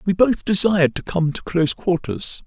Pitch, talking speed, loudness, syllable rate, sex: 175 Hz, 195 wpm, -19 LUFS, 5.1 syllables/s, male